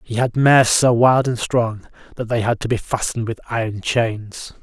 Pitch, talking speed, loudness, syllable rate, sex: 115 Hz, 210 wpm, -18 LUFS, 4.9 syllables/s, male